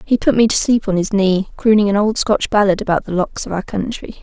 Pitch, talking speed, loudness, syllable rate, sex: 205 Hz, 270 wpm, -16 LUFS, 5.7 syllables/s, female